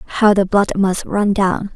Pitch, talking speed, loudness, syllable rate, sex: 195 Hz, 205 wpm, -16 LUFS, 4.7 syllables/s, female